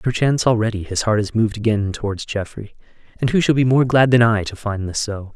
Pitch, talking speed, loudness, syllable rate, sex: 110 Hz, 235 wpm, -18 LUFS, 6.0 syllables/s, male